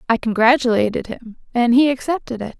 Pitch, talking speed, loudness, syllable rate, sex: 245 Hz, 160 wpm, -18 LUFS, 5.8 syllables/s, female